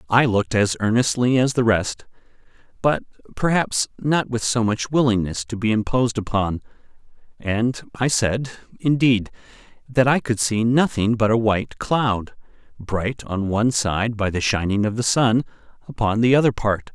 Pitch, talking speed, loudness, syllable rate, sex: 115 Hz, 160 wpm, -20 LUFS, 4.6 syllables/s, male